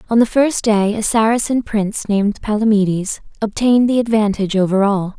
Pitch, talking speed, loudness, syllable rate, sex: 215 Hz, 160 wpm, -16 LUFS, 5.7 syllables/s, female